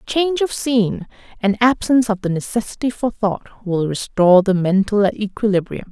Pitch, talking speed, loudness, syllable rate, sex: 210 Hz, 150 wpm, -18 LUFS, 5.2 syllables/s, female